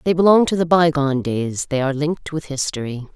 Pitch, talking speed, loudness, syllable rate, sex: 150 Hz, 210 wpm, -19 LUFS, 6.0 syllables/s, female